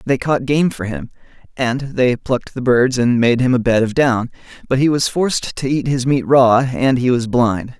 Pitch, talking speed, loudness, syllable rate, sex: 125 Hz, 230 wpm, -16 LUFS, 4.7 syllables/s, male